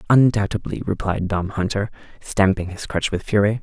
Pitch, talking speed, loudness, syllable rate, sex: 100 Hz, 150 wpm, -21 LUFS, 5.1 syllables/s, male